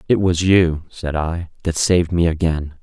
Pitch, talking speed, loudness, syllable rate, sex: 85 Hz, 190 wpm, -18 LUFS, 4.5 syllables/s, male